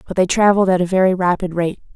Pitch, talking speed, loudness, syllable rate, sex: 185 Hz, 245 wpm, -16 LUFS, 7.1 syllables/s, female